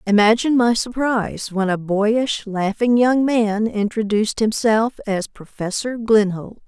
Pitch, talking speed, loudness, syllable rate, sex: 220 Hz, 125 wpm, -19 LUFS, 4.2 syllables/s, female